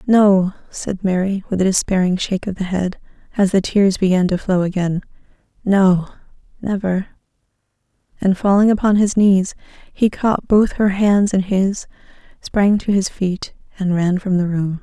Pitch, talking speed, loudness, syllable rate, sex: 190 Hz, 160 wpm, -17 LUFS, 4.5 syllables/s, female